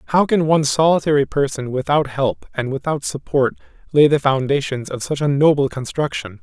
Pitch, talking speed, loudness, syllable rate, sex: 140 Hz, 170 wpm, -18 LUFS, 5.4 syllables/s, male